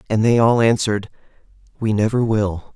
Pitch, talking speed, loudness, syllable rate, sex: 110 Hz, 155 wpm, -18 LUFS, 5.5 syllables/s, male